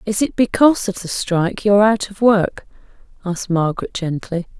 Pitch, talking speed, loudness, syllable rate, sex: 200 Hz, 170 wpm, -18 LUFS, 5.5 syllables/s, female